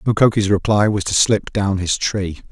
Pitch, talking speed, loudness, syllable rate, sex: 100 Hz, 190 wpm, -17 LUFS, 4.7 syllables/s, male